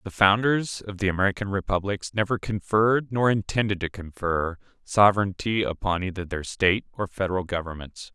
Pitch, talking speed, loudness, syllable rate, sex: 100 Hz, 145 wpm, -24 LUFS, 5.5 syllables/s, male